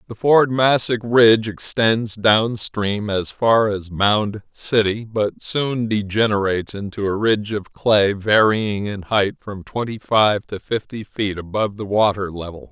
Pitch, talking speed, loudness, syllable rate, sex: 105 Hz, 155 wpm, -19 LUFS, 4.0 syllables/s, male